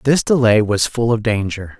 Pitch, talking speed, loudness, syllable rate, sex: 110 Hz, 200 wpm, -16 LUFS, 4.6 syllables/s, male